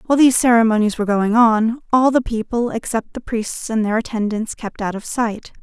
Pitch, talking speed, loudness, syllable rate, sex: 225 Hz, 205 wpm, -18 LUFS, 5.5 syllables/s, female